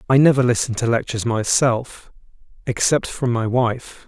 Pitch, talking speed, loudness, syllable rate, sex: 120 Hz, 130 wpm, -19 LUFS, 4.8 syllables/s, male